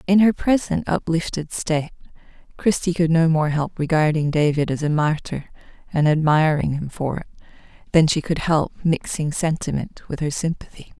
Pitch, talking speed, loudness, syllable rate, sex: 160 Hz, 160 wpm, -21 LUFS, 5.0 syllables/s, female